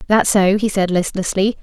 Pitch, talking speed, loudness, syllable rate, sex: 195 Hz, 185 wpm, -16 LUFS, 5.0 syllables/s, female